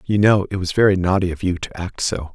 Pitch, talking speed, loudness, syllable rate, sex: 95 Hz, 280 wpm, -19 LUFS, 6.1 syllables/s, male